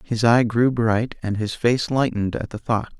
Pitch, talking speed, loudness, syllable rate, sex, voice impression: 115 Hz, 220 wpm, -21 LUFS, 4.6 syllables/s, male, very masculine, old, very thick, very relaxed, very weak, dark, very soft, muffled, fluent, cool, very intellectual, very sincere, very calm, very mature, friendly, very reassuring, unique, elegant, slightly wild, sweet, slightly lively, very kind, very modest